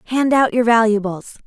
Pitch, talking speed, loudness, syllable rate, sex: 230 Hz, 165 wpm, -16 LUFS, 5.4 syllables/s, female